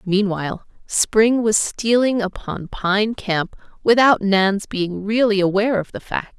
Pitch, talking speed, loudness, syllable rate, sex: 210 Hz, 140 wpm, -19 LUFS, 4.0 syllables/s, female